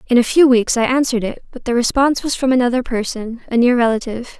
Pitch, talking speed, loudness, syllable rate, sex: 245 Hz, 230 wpm, -16 LUFS, 6.6 syllables/s, female